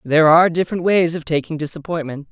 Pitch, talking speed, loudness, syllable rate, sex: 160 Hz, 180 wpm, -17 LUFS, 6.8 syllables/s, male